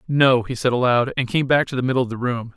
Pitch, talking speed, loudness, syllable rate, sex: 125 Hz, 305 wpm, -20 LUFS, 6.4 syllables/s, male